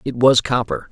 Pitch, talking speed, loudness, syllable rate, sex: 120 Hz, 195 wpm, -17 LUFS, 4.9 syllables/s, male